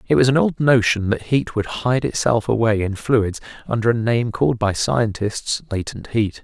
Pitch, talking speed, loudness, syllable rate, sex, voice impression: 115 Hz, 195 wpm, -19 LUFS, 4.7 syllables/s, male, very masculine, very middle-aged, very thick, tensed, slightly weak, bright, soft, clear, fluent, slightly raspy, cool, very intellectual, refreshing, very sincere, calm, mature, very friendly, reassuring, unique, very elegant, slightly wild, sweet, very lively, kind, slightly intense